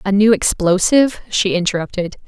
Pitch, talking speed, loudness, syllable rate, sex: 195 Hz, 130 wpm, -16 LUFS, 5.5 syllables/s, female